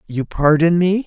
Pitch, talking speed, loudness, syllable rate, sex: 165 Hz, 170 wpm, -16 LUFS, 4.4 syllables/s, male